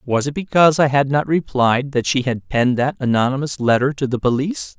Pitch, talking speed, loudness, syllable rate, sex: 135 Hz, 215 wpm, -18 LUFS, 5.7 syllables/s, male